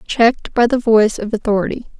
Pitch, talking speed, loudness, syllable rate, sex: 225 Hz, 180 wpm, -16 LUFS, 6.2 syllables/s, female